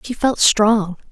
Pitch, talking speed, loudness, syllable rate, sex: 215 Hz, 160 wpm, -16 LUFS, 3.3 syllables/s, female